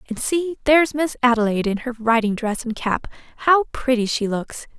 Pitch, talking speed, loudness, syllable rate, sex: 245 Hz, 190 wpm, -20 LUFS, 5.3 syllables/s, female